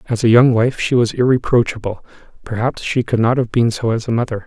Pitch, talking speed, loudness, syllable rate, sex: 120 Hz, 230 wpm, -16 LUFS, 5.8 syllables/s, male